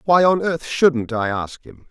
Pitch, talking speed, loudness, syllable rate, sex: 140 Hz, 220 wpm, -19 LUFS, 3.9 syllables/s, male